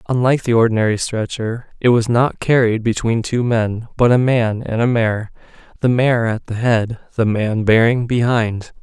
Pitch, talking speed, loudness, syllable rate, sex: 115 Hz, 170 wpm, -17 LUFS, 4.7 syllables/s, male